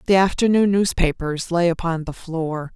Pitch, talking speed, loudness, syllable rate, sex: 175 Hz, 150 wpm, -20 LUFS, 4.6 syllables/s, female